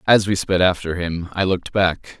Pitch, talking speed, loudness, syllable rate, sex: 90 Hz, 220 wpm, -19 LUFS, 5.0 syllables/s, male